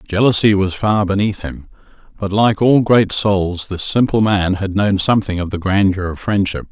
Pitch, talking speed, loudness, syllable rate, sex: 100 Hz, 190 wpm, -16 LUFS, 4.8 syllables/s, male